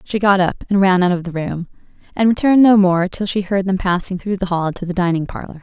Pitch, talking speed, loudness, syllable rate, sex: 190 Hz, 265 wpm, -17 LUFS, 6.0 syllables/s, female